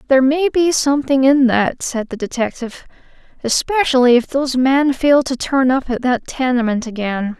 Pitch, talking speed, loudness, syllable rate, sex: 260 Hz, 170 wpm, -16 LUFS, 5.1 syllables/s, female